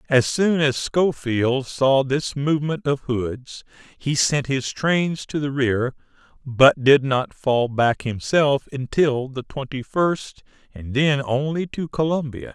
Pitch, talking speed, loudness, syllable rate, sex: 140 Hz, 150 wpm, -21 LUFS, 3.6 syllables/s, male